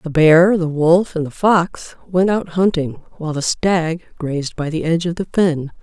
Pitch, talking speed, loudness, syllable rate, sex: 165 Hz, 205 wpm, -17 LUFS, 4.6 syllables/s, female